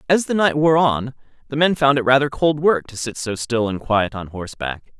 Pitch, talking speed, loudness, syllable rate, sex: 130 Hz, 240 wpm, -19 LUFS, 5.2 syllables/s, male